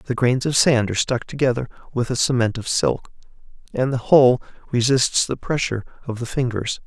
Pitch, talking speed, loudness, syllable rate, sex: 125 Hz, 185 wpm, -20 LUFS, 5.6 syllables/s, male